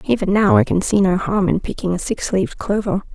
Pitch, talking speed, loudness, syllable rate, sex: 200 Hz, 250 wpm, -18 LUFS, 5.7 syllables/s, female